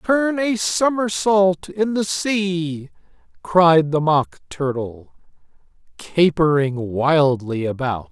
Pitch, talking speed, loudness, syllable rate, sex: 165 Hz, 95 wpm, -19 LUFS, 3.0 syllables/s, male